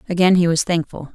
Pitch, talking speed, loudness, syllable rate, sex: 170 Hz, 210 wpm, -17 LUFS, 6.2 syllables/s, female